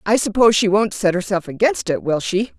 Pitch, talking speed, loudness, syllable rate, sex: 205 Hz, 230 wpm, -18 LUFS, 5.8 syllables/s, female